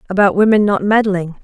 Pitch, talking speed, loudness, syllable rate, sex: 200 Hz, 170 wpm, -14 LUFS, 5.8 syllables/s, female